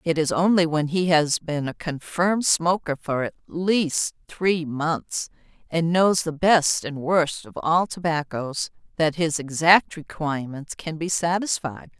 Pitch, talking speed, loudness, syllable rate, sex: 160 Hz, 155 wpm, -23 LUFS, 4.0 syllables/s, female